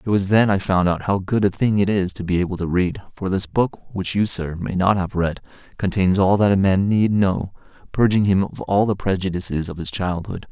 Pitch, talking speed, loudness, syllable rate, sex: 95 Hz, 240 wpm, -20 LUFS, 5.3 syllables/s, male